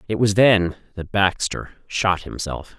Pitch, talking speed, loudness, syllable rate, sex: 95 Hz, 150 wpm, -20 LUFS, 4.0 syllables/s, male